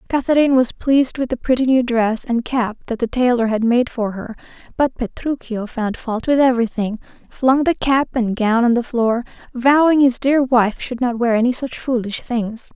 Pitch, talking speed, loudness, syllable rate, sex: 245 Hz, 200 wpm, -18 LUFS, 4.9 syllables/s, female